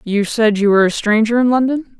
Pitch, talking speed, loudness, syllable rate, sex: 225 Hz, 240 wpm, -14 LUFS, 5.8 syllables/s, female